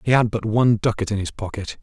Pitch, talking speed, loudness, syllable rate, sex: 110 Hz, 265 wpm, -21 LUFS, 6.4 syllables/s, male